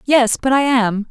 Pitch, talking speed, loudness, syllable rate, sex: 245 Hz, 215 wpm, -15 LUFS, 4.1 syllables/s, female